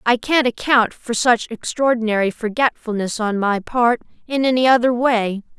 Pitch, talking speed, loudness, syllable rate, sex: 235 Hz, 150 wpm, -18 LUFS, 4.8 syllables/s, female